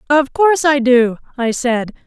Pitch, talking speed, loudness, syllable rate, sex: 265 Hz, 175 wpm, -15 LUFS, 4.6 syllables/s, female